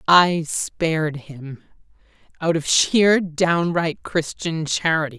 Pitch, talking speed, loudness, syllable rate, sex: 160 Hz, 95 wpm, -20 LUFS, 3.4 syllables/s, female